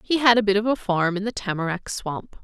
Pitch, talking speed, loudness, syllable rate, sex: 205 Hz, 270 wpm, -22 LUFS, 5.7 syllables/s, female